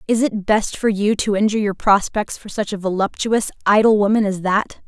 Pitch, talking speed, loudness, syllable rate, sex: 205 Hz, 210 wpm, -18 LUFS, 5.3 syllables/s, female